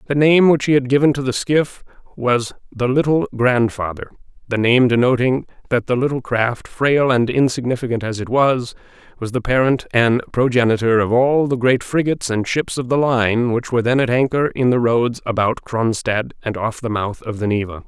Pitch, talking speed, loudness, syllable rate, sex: 125 Hz, 195 wpm, -18 LUFS, 5.1 syllables/s, male